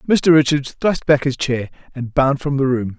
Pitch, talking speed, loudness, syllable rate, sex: 135 Hz, 220 wpm, -17 LUFS, 5.1 syllables/s, male